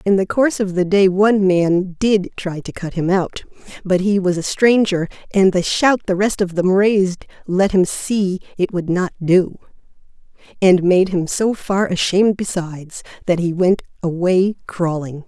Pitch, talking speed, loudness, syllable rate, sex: 185 Hz, 180 wpm, -17 LUFS, 4.6 syllables/s, female